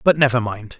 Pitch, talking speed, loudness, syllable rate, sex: 125 Hz, 225 wpm, -19 LUFS, 5.8 syllables/s, male